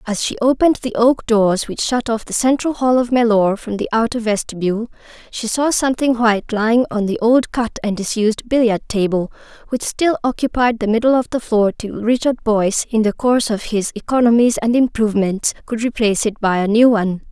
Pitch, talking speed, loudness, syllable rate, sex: 230 Hz, 200 wpm, -17 LUFS, 5.5 syllables/s, female